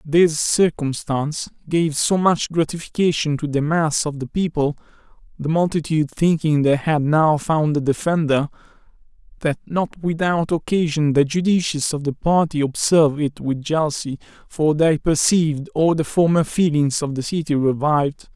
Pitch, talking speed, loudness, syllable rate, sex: 155 Hz, 145 wpm, -19 LUFS, 4.0 syllables/s, male